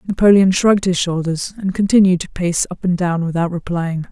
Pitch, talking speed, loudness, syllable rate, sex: 180 Hz, 190 wpm, -16 LUFS, 5.5 syllables/s, female